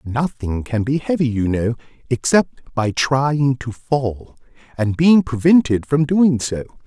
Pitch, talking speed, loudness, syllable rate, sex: 130 Hz, 150 wpm, -18 LUFS, 3.8 syllables/s, male